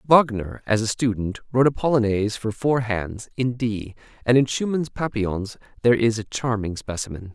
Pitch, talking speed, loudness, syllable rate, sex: 115 Hz, 170 wpm, -23 LUFS, 5.3 syllables/s, male